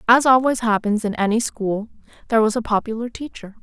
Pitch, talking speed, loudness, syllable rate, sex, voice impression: 225 Hz, 180 wpm, -20 LUFS, 6.0 syllables/s, female, very feminine, young, very thin, very tensed, powerful, very bright, hard, clear, fluent, slightly raspy, very cute, intellectual, very refreshing, sincere, calm, very friendly, very reassuring, very unique, very elegant, very sweet, lively, strict, slightly intense